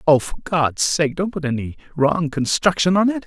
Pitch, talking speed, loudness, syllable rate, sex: 160 Hz, 200 wpm, -19 LUFS, 4.9 syllables/s, male